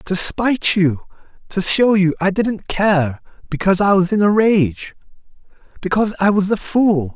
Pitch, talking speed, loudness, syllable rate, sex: 190 Hz, 145 wpm, -16 LUFS, 4.6 syllables/s, male